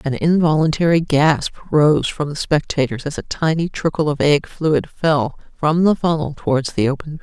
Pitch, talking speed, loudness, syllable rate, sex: 150 Hz, 185 wpm, -18 LUFS, 5.2 syllables/s, female